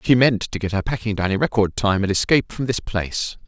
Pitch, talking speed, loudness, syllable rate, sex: 110 Hz, 260 wpm, -20 LUFS, 6.0 syllables/s, male